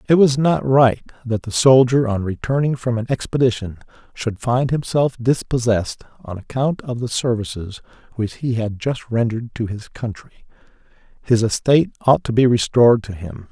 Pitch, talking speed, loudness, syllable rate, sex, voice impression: 120 Hz, 165 wpm, -19 LUFS, 5.1 syllables/s, male, masculine, middle-aged, slightly weak, slightly halting, raspy, sincere, calm, mature, friendly, reassuring, slightly wild, kind, modest